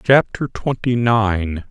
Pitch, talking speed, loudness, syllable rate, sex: 110 Hz, 105 wpm, -18 LUFS, 3.3 syllables/s, male